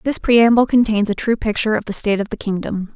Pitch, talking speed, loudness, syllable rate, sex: 215 Hz, 245 wpm, -17 LUFS, 6.4 syllables/s, female